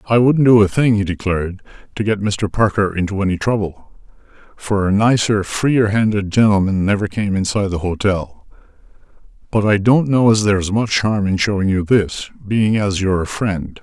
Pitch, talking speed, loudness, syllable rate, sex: 105 Hz, 180 wpm, -16 LUFS, 5.1 syllables/s, male